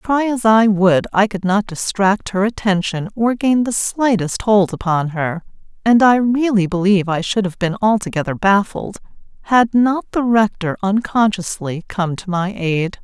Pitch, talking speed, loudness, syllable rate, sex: 200 Hz, 165 wpm, -17 LUFS, 4.4 syllables/s, female